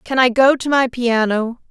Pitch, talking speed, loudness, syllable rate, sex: 245 Hz, 210 wpm, -16 LUFS, 4.6 syllables/s, female